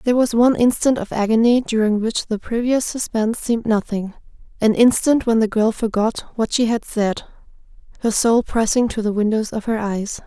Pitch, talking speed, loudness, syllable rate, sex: 225 Hz, 180 wpm, -19 LUFS, 5.3 syllables/s, female